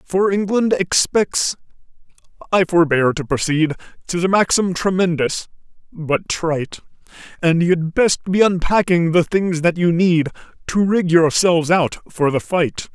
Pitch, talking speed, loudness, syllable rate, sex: 175 Hz, 135 wpm, -17 LUFS, 4.2 syllables/s, male